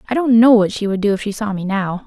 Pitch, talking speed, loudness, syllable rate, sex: 210 Hz, 350 wpm, -16 LUFS, 6.4 syllables/s, female